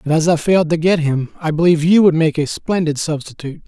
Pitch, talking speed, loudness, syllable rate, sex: 160 Hz, 245 wpm, -16 LUFS, 6.4 syllables/s, male